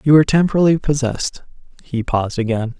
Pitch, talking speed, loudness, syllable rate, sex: 135 Hz, 150 wpm, -17 LUFS, 7.0 syllables/s, male